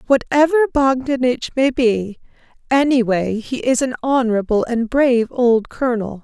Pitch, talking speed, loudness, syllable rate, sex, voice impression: 250 Hz, 125 wpm, -17 LUFS, 4.7 syllables/s, female, feminine, adult-like, soft, intellectual, elegant, sweet, kind